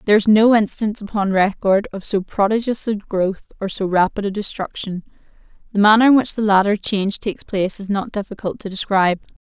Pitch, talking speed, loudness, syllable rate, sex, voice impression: 205 Hz, 190 wpm, -18 LUFS, 6.0 syllables/s, female, feminine, adult-like, tensed, powerful, clear, fluent, intellectual, friendly, elegant, lively, slightly sharp